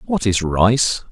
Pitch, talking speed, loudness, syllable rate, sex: 115 Hz, 160 wpm, -17 LUFS, 3.2 syllables/s, male